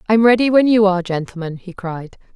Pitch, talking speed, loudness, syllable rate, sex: 195 Hz, 205 wpm, -16 LUFS, 5.9 syllables/s, female